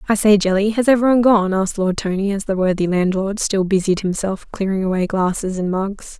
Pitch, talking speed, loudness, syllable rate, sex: 195 Hz, 205 wpm, -18 LUFS, 5.7 syllables/s, female